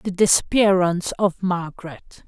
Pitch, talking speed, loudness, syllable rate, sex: 185 Hz, 105 wpm, -19 LUFS, 4.8 syllables/s, female